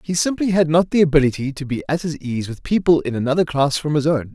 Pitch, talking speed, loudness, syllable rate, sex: 150 Hz, 260 wpm, -19 LUFS, 6.2 syllables/s, male